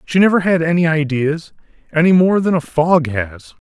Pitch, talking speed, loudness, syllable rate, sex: 155 Hz, 180 wpm, -15 LUFS, 4.9 syllables/s, male